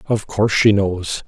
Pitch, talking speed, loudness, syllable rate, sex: 100 Hz, 190 wpm, -17 LUFS, 4.6 syllables/s, male